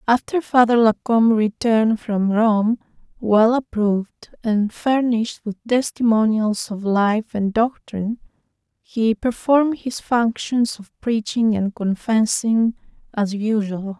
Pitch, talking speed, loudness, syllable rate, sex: 225 Hz, 115 wpm, -19 LUFS, 3.9 syllables/s, female